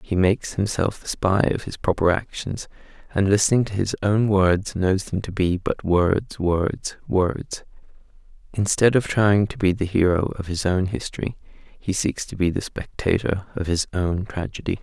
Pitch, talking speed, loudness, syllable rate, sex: 95 Hz, 180 wpm, -22 LUFS, 4.5 syllables/s, male